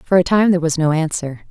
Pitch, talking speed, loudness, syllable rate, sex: 170 Hz, 280 wpm, -16 LUFS, 6.7 syllables/s, female